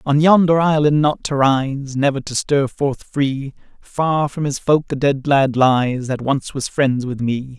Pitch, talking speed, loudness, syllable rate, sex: 140 Hz, 200 wpm, -18 LUFS, 3.9 syllables/s, male